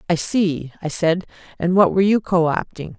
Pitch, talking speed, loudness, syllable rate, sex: 175 Hz, 200 wpm, -19 LUFS, 5.1 syllables/s, female